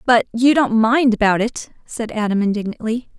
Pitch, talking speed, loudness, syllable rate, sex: 225 Hz, 170 wpm, -17 LUFS, 5.1 syllables/s, female